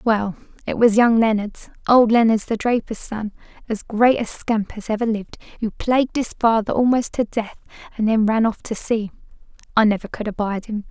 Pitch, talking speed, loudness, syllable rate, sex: 220 Hz, 185 wpm, -20 LUFS, 5.3 syllables/s, female